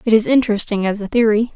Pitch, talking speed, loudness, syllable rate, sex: 220 Hz, 230 wpm, -16 LUFS, 7.1 syllables/s, female